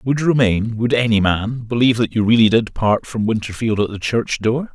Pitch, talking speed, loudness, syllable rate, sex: 115 Hz, 190 wpm, -17 LUFS, 5.3 syllables/s, male